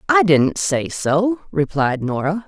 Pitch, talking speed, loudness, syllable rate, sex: 175 Hz, 145 wpm, -18 LUFS, 3.6 syllables/s, female